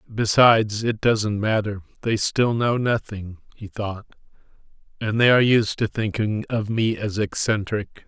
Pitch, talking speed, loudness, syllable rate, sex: 110 Hz, 150 wpm, -21 LUFS, 4.3 syllables/s, male